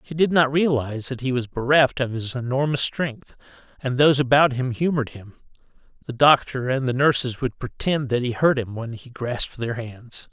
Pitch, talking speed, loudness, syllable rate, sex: 130 Hz, 200 wpm, -22 LUFS, 5.2 syllables/s, male